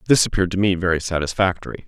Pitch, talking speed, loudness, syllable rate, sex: 90 Hz, 190 wpm, -20 LUFS, 7.7 syllables/s, male